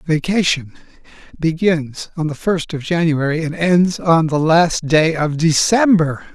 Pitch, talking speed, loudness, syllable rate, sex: 160 Hz, 140 wpm, -16 LUFS, 4.0 syllables/s, male